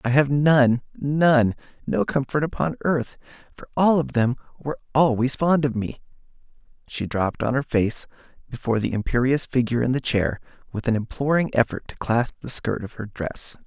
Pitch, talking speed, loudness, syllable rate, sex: 130 Hz, 175 wpm, -23 LUFS, 5.2 syllables/s, male